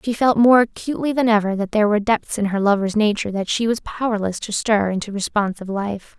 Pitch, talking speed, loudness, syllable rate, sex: 210 Hz, 225 wpm, -19 LUFS, 6.2 syllables/s, female